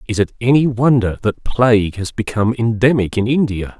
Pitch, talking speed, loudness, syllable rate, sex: 115 Hz, 175 wpm, -16 LUFS, 5.4 syllables/s, male